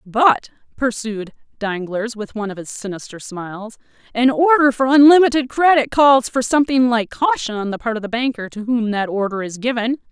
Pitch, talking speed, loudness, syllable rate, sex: 235 Hz, 185 wpm, -17 LUFS, 5.3 syllables/s, female